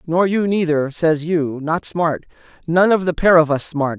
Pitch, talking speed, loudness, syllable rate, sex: 165 Hz, 195 wpm, -17 LUFS, 4.3 syllables/s, male